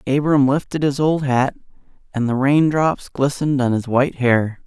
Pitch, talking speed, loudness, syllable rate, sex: 135 Hz, 165 wpm, -18 LUFS, 4.8 syllables/s, male